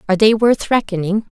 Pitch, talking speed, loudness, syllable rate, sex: 210 Hz, 180 wpm, -16 LUFS, 6.2 syllables/s, female